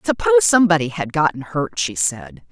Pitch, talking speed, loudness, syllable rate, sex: 145 Hz, 165 wpm, -17 LUFS, 5.9 syllables/s, female